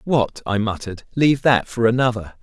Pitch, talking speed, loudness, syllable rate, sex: 115 Hz, 175 wpm, -19 LUFS, 5.5 syllables/s, male